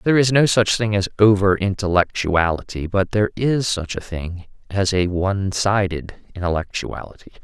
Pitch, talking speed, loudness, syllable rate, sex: 100 Hz, 155 wpm, -19 LUFS, 5.1 syllables/s, male